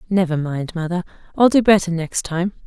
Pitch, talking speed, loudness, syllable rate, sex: 175 Hz, 180 wpm, -19 LUFS, 5.5 syllables/s, female